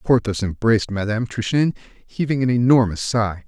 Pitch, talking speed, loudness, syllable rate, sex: 115 Hz, 140 wpm, -20 LUFS, 5.2 syllables/s, male